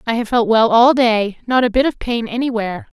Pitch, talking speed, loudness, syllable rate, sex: 230 Hz, 240 wpm, -16 LUFS, 5.6 syllables/s, female